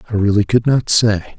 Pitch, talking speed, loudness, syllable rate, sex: 105 Hz, 215 wpm, -15 LUFS, 5.7 syllables/s, male